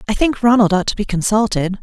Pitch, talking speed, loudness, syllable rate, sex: 210 Hz, 230 wpm, -16 LUFS, 6.2 syllables/s, female